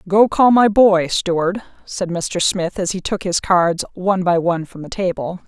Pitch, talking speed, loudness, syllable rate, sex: 185 Hz, 210 wpm, -17 LUFS, 4.6 syllables/s, female